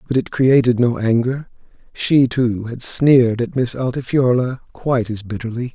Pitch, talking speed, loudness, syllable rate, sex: 125 Hz, 155 wpm, -17 LUFS, 4.7 syllables/s, male